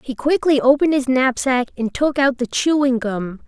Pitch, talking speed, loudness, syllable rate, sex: 260 Hz, 190 wpm, -18 LUFS, 4.9 syllables/s, female